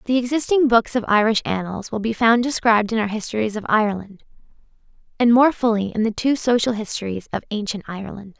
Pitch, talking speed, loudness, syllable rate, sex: 220 Hz, 185 wpm, -20 LUFS, 6.1 syllables/s, female